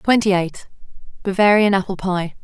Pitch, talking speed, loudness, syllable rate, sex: 195 Hz, 100 wpm, -18 LUFS, 5.0 syllables/s, female